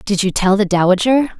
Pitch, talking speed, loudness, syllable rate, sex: 205 Hz, 215 wpm, -14 LUFS, 5.4 syllables/s, female